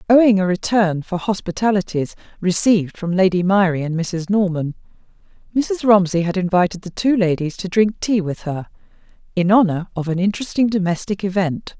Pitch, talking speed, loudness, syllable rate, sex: 190 Hz, 160 wpm, -18 LUFS, 5.4 syllables/s, female